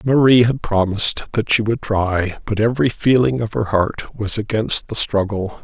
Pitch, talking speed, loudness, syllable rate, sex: 110 Hz, 180 wpm, -18 LUFS, 4.7 syllables/s, male